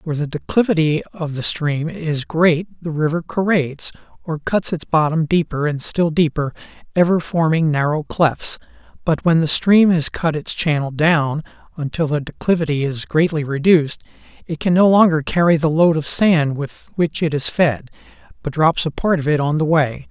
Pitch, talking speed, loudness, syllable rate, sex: 160 Hz, 180 wpm, -18 LUFS, 4.8 syllables/s, male